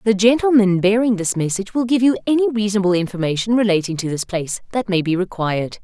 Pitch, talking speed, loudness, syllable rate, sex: 200 Hz, 195 wpm, -18 LUFS, 6.6 syllables/s, female